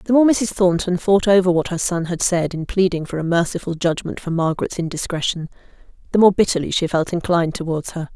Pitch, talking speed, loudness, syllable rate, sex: 175 Hz, 205 wpm, -19 LUFS, 5.9 syllables/s, female